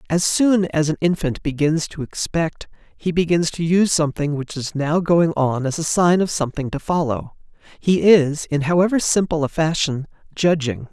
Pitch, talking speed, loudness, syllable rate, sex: 160 Hz, 180 wpm, -19 LUFS, 4.9 syllables/s, male